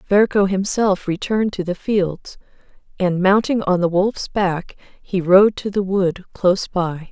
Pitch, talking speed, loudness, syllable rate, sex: 190 Hz, 160 wpm, -18 LUFS, 4.1 syllables/s, female